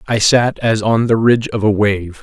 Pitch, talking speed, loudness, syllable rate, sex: 110 Hz, 245 wpm, -14 LUFS, 4.8 syllables/s, male